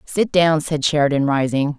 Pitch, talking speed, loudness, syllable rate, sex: 150 Hz, 170 wpm, -18 LUFS, 4.7 syllables/s, female